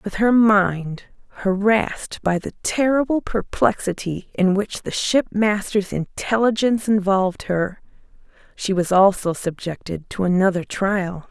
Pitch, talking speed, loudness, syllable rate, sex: 200 Hz, 115 wpm, -20 LUFS, 4.2 syllables/s, female